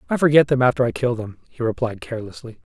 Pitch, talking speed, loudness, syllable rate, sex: 120 Hz, 220 wpm, -20 LUFS, 6.9 syllables/s, male